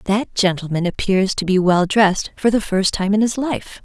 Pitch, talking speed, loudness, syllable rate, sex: 195 Hz, 220 wpm, -18 LUFS, 4.8 syllables/s, female